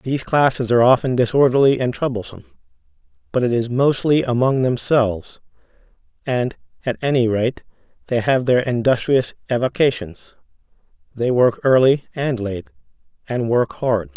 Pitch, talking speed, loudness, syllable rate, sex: 125 Hz, 125 wpm, -18 LUFS, 5.1 syllables/s, male